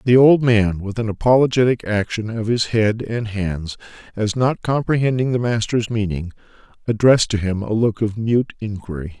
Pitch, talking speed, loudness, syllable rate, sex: 110 Hz, 170 wpm, -19 LUFS, 5.0 syllables/s, male